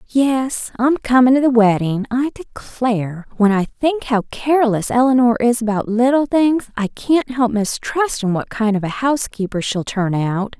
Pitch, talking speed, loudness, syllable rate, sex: 235 Hz, 165 wpm, -17 LUFS, 4.5 syllables/s, female